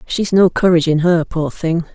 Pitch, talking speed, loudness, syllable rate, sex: 170 Hz, 215 wpm, -15 LUFS, 5.2 syllables/s, female